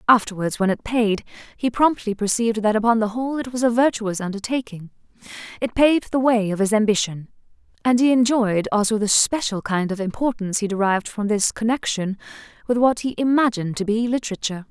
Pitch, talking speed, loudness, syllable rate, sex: 220 Hz, 180 wpm, -21 LUFS, 6.0 syllables/s, female